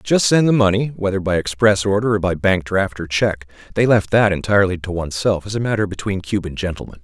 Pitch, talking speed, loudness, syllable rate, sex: 100 Hz, 220 wpm, -18 LUFS, 6.2 syllables/s, male